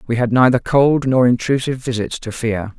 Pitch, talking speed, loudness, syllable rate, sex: 125 Hz, 195 wpm, -16 LUFS, 5.4 syllables/s, male